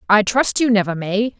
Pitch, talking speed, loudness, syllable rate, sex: 215 Hz, 215 wpm, -17 LUFS, 5.0 syllables/s, female